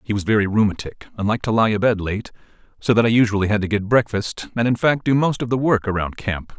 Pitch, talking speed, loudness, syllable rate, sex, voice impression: 110 Hz, 255 wpm, -20 LUFS, 6.3 syllables/s, male, very masculine, adult-like, slightly thick, slightly fluent, cool, slightly refreshing, sincere